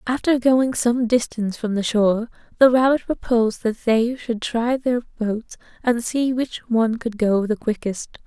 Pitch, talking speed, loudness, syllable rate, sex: 235 Hz, 175 wpm, -20 LUFS, 4.6 syllables/s, female